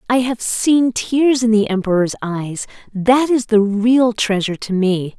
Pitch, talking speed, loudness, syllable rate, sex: 220 Hz, 160 wpm, -16 LUFS, 4.1 syllables/s, female